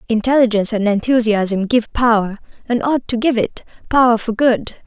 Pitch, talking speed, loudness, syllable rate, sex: 230 Hz, 150 wpm, -16 LUFS, 5.0 syllables/s, female